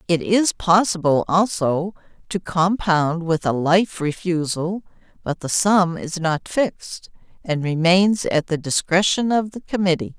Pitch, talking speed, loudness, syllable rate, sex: 175 Hz, 140 wpm, -20 LUFS, 4.0 syllables/s, female